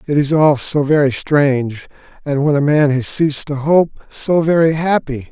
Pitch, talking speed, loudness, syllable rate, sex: 145 Hz, 190 wpm, -15 LUFS, 4.6 syllables/s, male